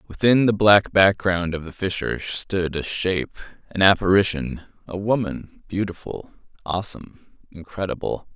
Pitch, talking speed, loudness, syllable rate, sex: 95 Hz, 115 wpm, -21 LUFS, 4.9 syllables/s, male